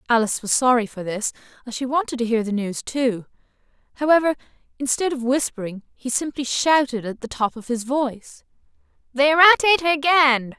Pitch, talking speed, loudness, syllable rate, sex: 260 Hz, 170 wpm, -20 LUFS, 5.5 syllables/s, female